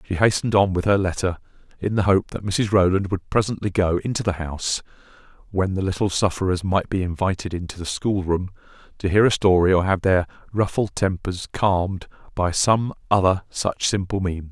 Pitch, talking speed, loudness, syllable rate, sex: 95 Hz, 180 wpm, -22 LUFS, 5.4 syllables/s, male